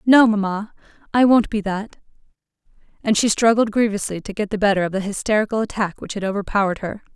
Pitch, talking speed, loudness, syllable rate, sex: 205 Hz, 185 wpm, -20 LUFS, 6.4 syllables/s, female